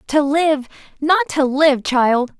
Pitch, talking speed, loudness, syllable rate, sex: 275 Hz, 125 wpm, -17 LUFS, 3.1 syllables/s, female